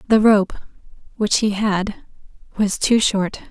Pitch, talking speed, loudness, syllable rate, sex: 205 Hz, 135 wpm, -18 LUFS, 3.6 syllables/s, female